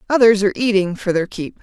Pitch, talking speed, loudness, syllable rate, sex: 205 Hz, 220 wpm, -17 LUFS, 6.4 syllables/s, female